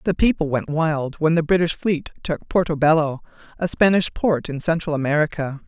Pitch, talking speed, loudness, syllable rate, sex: 160 Hz, 180 wpm, -21 LUFS, 5.2 syllables/s, female